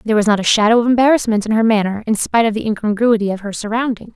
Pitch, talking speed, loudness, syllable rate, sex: 220 Hz, 260 wpm, -15 LUFS, 7.5 syllables/s, female